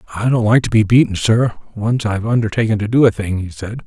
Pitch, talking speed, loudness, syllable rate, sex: 110 Hz, 250 wpm, -16 LUFS, 6.2 syllables/s, male